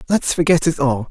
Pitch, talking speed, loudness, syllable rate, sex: 155 Hz, 215 wpm, -17 LUFS, 5.6 syllables/s, male